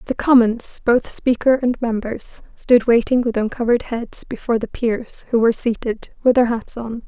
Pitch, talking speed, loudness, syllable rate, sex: 235 Hz, 180 wpm, -18 LUFS, 4.9 syllables/s, female